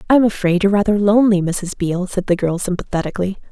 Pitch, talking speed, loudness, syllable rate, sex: 190 Hz, 190 wpm, -17 LUFS, 6.9 syllables/s, female